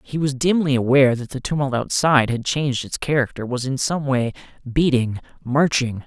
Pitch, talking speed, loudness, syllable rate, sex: 130 Hz, 180 wpm, -20 LUFS, 5.4 syllables/s, male